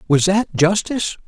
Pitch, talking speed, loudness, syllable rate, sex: 185 Hz, 140 wpm, -17 LUFS, 5.1 syllables/s, male